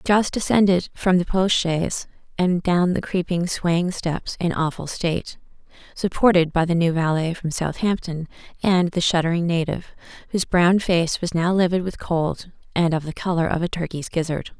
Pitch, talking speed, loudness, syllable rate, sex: 175 Hz, 175 wpm, -21 LUFS, 4.9 syllables/s, female